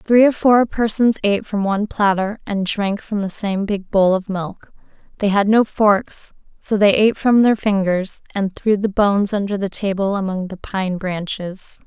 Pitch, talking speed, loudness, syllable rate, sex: 200 Hz, 190 wpm, -18 LUFS, 4.6 syllables/s, female